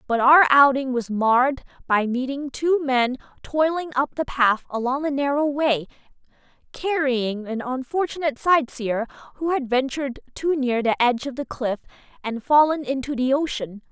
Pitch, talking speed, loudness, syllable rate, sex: 265 Hz, 155 wpm, -22 LUFS, 4.8 syllables/s, female